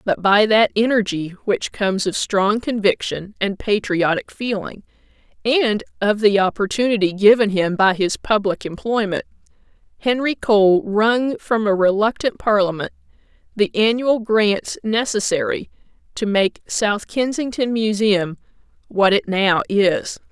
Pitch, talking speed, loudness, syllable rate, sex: 210 Hz, 125 wpm, -18 LUFS, 4.2 syllables/s, female